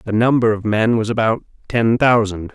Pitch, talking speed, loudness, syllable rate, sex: 110 Hz, 190 wpm, -17 LUFS, 5.0 syllables/s, male